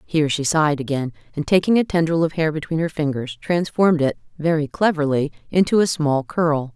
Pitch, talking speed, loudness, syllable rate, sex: 155 Hz, 185 wpm, -20 LUFS, 5.6 syllables/s, female